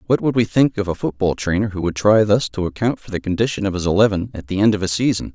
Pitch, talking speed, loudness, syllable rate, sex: 105 Hz, 290 wpm, -19 LUFS, 6.6 syllables/s, male